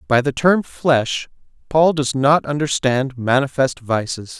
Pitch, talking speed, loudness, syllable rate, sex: 135 Hz, 135 wpm, -18 LUFS, 3.9 syllables/s, male